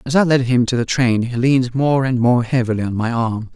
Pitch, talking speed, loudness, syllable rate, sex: 125 Hz, 270 wpm, -17 LUFS, 5.6 syllables/s, male